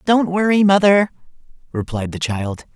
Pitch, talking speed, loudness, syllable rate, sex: 165 Hz, 130 wpm, -17 LUFS, 4.5 syllables/s, male